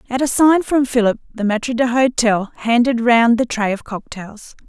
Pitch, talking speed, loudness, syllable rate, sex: 235 Hz, 180 wpm, -16 LUFS, 4.4 syllables/s, female